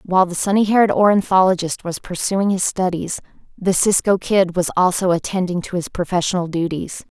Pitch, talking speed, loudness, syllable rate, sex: 185 Hz, 160 wpm, -18 LUFS, 5.5 syllables/s, female